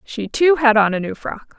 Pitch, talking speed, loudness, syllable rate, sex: 240 Hz, 265 wpm, -16 LUFS, 4.7 syllables/s, female